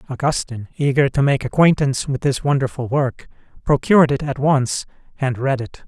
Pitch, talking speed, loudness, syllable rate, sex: 135 Hz, 165 wpm, -19 LUFS, 5.5 syllables/s, male